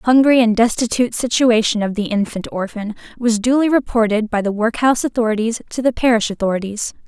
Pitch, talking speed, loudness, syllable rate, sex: 225 Hz, 170 wpm, -17 LUFS, 6.0 syllables/s, female